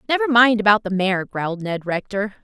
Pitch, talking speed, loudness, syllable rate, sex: 210 Hz, 195 wpm, -19 LUFS, 5.4 syllables/s, female